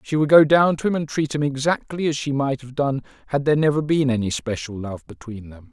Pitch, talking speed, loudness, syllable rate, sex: 140 Hz, 250 wpm, -21 LUFS, 5.8 syllables/s, male